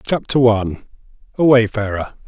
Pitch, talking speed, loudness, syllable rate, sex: 115 Hz, 105 wpm, -16 LUFS, 5.2 syllables/s, male